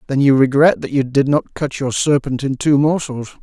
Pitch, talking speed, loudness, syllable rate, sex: 140 Hz, 225 wpm, -16 LUFS, 5.1 syllables/s, male